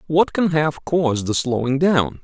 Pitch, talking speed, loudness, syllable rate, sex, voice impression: 145 Hz, 190 wpm, -19 LUFS, 4.4 syllables/s, male, masculine, adult-like, tensed, bright, clear, cool, slightly refreshing, friendly, wild, slightly intense